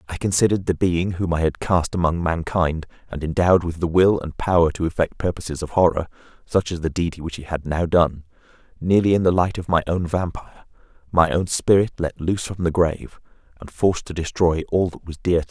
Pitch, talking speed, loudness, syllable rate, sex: 85 Hz, 220 wpm, -21 LUFS, 5.9 syllables/s, male